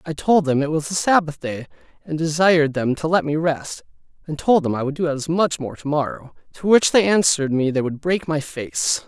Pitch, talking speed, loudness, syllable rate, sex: 155 Hz, 230 wpm, -20 LUFS, 5.3 syllables/s, male